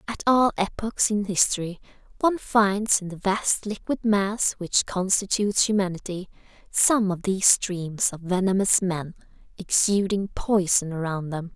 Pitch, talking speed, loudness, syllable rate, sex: 195 Hz, 135 wpm, -23 LUFS, 4.4 syllables/s, female